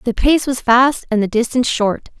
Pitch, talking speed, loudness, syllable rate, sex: 245 Hz, 220 wpm, -15 LUFS, 5.1 syllables/s, female